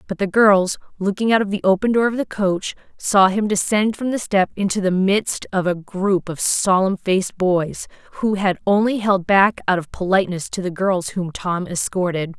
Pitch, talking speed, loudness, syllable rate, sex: 195 Hz, 205 wpm, -19 LUFS, 4.8 syllables/s, female